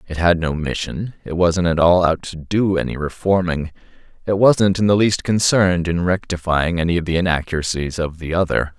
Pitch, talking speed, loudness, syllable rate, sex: 85 Hz, 190 wpm, -18 LUFS, 5.3 syllables/s, male